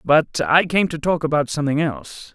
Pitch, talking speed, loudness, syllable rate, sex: 150 Hz, 205 wpm, -19 LUFS, 5.5 syllables/s, male